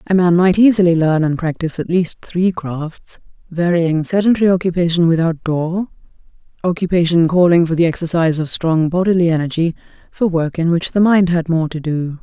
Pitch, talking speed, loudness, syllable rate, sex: 170 Hz, 165 wpm, -16 LUFS, 5.4 syllables/s, female